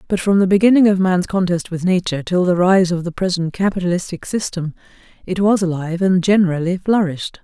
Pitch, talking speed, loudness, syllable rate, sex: 180 Hz, 185 wpm, -17 LUFS, 6.1 syllables/s, female